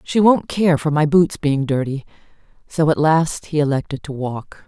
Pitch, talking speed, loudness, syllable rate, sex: 150 Hz, 195 wpm, -18 LUFS, 4.6 syllables/s, female